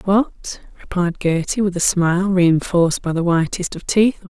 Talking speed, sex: 165 wpm, female